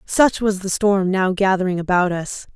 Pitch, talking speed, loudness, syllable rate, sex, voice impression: 190 Hz, 190 wpm, -18 LUFS, 4.6 syllables/s, female, feminine, adult-like, bright, clear, fluent, intellectual, sincere, calm, friendly, reassuring, elegant, kind